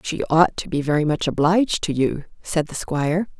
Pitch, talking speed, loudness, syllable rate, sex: 160 Hz, 210 wpm, -21 LUFS, 5.3 syllables/s, female